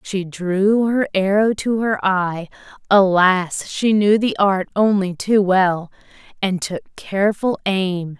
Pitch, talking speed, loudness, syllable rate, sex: 195 Hz, 125 wpm, -18 LUFS, 3.6 syllables/s, female